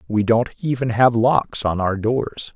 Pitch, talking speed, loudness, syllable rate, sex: 115 Hz, 190 wpm, -19 LUFS, 4.0 syllables/s, male